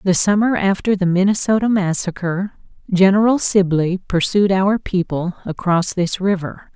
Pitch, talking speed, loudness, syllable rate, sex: 190 Hz, 125 wpm, -17 LUFS, 4.5 syllables/s, female